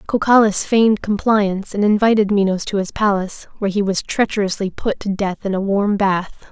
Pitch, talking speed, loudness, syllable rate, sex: 200 Hz, 185 wpm, -17 LUFS, 5.5 syllables/s, female